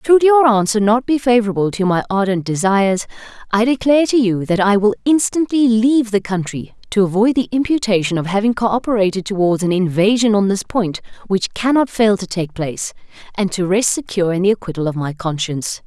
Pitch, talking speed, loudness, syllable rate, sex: 210 Hz, 190 wpm, -16 LUFS, 5.7 syllables/s, female